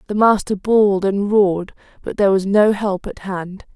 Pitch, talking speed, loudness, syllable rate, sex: 200 Hz, 190 wpm, -17 LUFS, 4.9 syllables/s, female